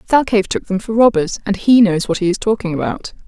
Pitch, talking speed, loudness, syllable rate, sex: 205 Hz, 240 wpm, -15 LUFS, 6.2 syllables/s, female